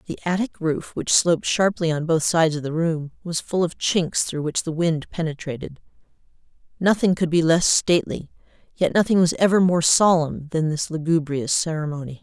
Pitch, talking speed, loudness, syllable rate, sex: 165 Hz, 175 wpm, -21 LUFS, 5.2 syllables/s, female